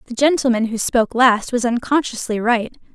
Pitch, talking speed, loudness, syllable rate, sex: 240 Hz, 165 wpm, -18 LUFS, 5.3 syllables/s, female